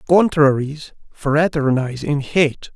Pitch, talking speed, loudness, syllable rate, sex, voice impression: 145 Hz, 85 wpm, -18 LUFS, 3.8 syllables/s, male, masculine, adult-like, slightly thick, slightly relaxed, soft, slightly muffled, slightly raspy, cool, intellectual, calm, mature, friendly, wild, lively, slightly intense